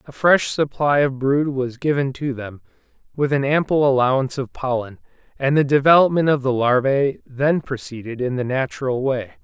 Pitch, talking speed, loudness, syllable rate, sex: 135 Hz, 170 wpm, -19 LUFS, 5.1 syllables/s, male